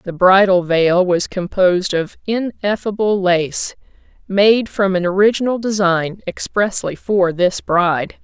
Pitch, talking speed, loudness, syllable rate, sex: 190 Hz, 125 wpm, -16 LUFS, 4.0 syllables/s, female